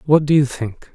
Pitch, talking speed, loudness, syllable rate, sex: 135 Hz, 255 wpm, -17 LUFS, 4.9 syllables/s, male